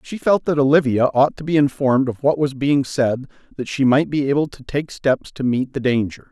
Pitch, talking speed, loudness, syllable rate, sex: 135 Hz, 240 wpm, -19 LUFS, 5.3 syllables/s, male